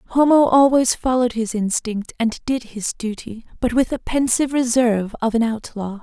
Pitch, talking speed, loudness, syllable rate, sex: 240 Hz, 170 wpm, -19 LUFS, 4.9 syllables/s, female